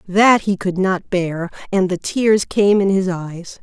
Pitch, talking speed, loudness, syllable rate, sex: 190 Hz, 200 wpm, -17 LUFS, 3.7 syllables/s, female